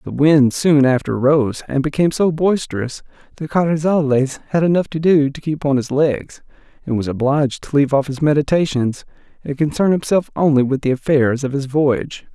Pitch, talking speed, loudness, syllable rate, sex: 145 Hz, 185 wpm, -17 LUFS, 5.3 syllables/s, male